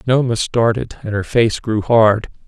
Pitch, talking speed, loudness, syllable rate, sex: 115 Hz, 170 wpm, -16 LUFS, 4.2 syllables/s, male